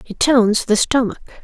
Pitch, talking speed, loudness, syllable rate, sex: 235 Hz, 165 wpm, -16 LUFS, 5.5 syllables/s, female